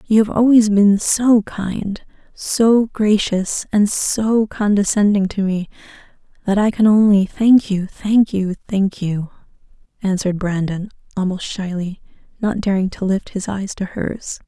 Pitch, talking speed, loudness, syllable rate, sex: 200 Hz, 145 wpm, -17 LUFS, 4.1 syllables/s, female